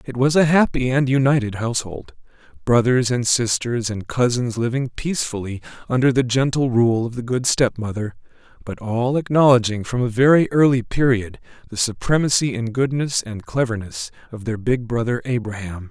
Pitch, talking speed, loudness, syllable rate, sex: 120 Hz, 155 wpm, -19 LUFS, 5.2 syllables/s, male